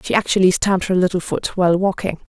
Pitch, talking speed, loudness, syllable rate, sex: 185 Hz, 205 wpm, -18 LUFS, 6.5 syllables/s, female